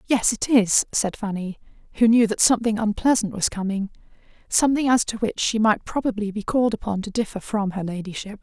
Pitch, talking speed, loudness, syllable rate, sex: 215 Hz, 185 wpm, -22 LUFS, 5.8 syllables/s, female